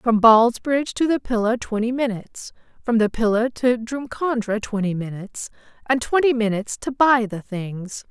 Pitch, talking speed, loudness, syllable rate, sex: 230 Hz, 155 wpm, -21 LUFS, 4.9 syllables/s, female